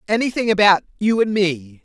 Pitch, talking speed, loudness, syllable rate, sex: 195 Hz, 165 wpm, -17 LUFS, 5.3 syllables/s, female